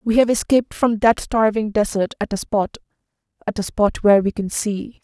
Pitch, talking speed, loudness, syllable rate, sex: 215 Hz, 190 wpm, -19 LUFS, 5.2 syllables/s, female